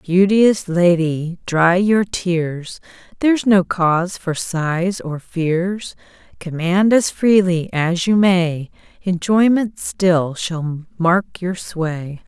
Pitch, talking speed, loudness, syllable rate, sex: 180 Hz, 115 wpm, -17 LUFS, 3.0 syllables/s, female